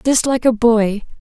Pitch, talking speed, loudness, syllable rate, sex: 230 Hz, 190 wpm, -15 LUFS, 4.2 syllables/s, female